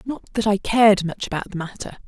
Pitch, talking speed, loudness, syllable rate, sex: 205 Hz, 230 wpm, -21 LUFS, 5.8 syllables/s, female